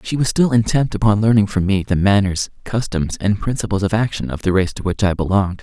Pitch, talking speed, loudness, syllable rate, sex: 105 Hz, 235 wpm, -18 LUFS, 5.9 syllables/s, male